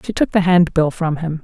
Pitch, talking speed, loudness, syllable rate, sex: 170 Hz, 250 wpm, -16 LUFS, 5.3 syllables/s, female